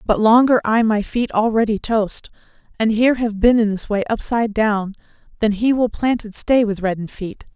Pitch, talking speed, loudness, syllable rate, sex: 220 Hz, 190 wpm, -18 LUFS, 5.2 syllables/s, female